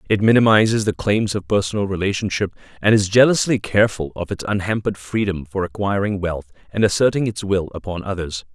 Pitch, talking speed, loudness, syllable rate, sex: 100 Hz, 170 wpm, -19 LUFS, 6.0 syllables/s, male